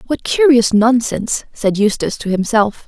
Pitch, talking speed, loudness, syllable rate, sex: 230 Hz, 145 wpm, -15 LUFS, 4.9 syllables/s, female